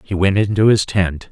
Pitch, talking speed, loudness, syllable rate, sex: 95 Hz, 230 wpm, -16 LUFS, 5.0 syllables/s, male